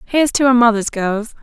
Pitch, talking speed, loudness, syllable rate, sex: 235 Hz, 210 wpm, -15 LUFS, 5.6 syllables/s, female